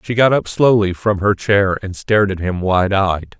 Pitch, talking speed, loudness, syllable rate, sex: 100 Hz, 230 wpm, -16 LUFS, 4.6 syllables/s, male